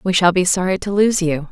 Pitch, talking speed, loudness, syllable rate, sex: 185 Hz, 280 wpm, -16 LUFS, 5.7 syllables/s, female